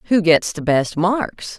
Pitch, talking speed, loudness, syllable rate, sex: 180 Hz, 190 wpm, -18 LUFS, 3.7 syllables/s, female